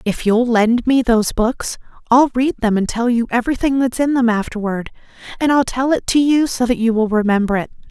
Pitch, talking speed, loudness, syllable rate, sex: 240 Hz, 220 wpm, -16 LUFS, 5.6 syllables/s, female